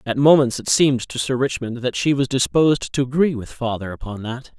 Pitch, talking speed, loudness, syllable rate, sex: 130 Hz, 220 wpm, -19 LUFS, 5.6 syllables/s, male